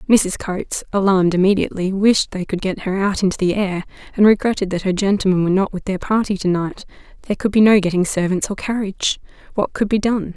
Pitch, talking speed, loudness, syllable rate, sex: 195 Hz, 205 wpm, -18 LUFS, 6.3 syllables/s, female